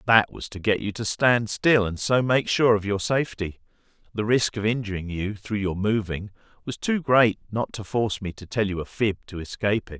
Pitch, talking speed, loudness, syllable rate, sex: 105 Hz, 230 wpm, -24 LUFS, 5.2 syllables/s, male